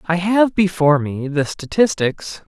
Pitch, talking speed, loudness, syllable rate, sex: 170 Hz, 140 wpm, -17 LUFS, 4.2 syllables/s, male